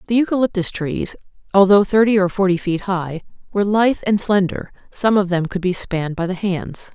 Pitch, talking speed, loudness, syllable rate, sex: 195 Hz, 190 wpm, -18 LUFS, 5.4 syllables/s, female